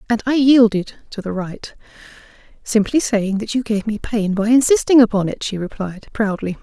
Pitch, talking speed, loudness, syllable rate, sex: 220 Hz, 180 wpm, -17 LUFS, 5.1 syllables/s, female